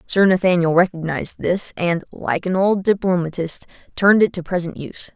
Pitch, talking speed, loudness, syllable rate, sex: 180 Hz, 165 wpm, -19 LUFS, 5.4 syllables/s, female